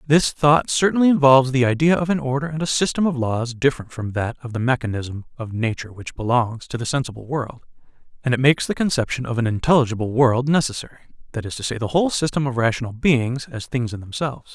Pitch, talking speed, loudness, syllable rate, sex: 130 Hz, 215 wpm, -20 LUFS, 5.0 syllables/s, male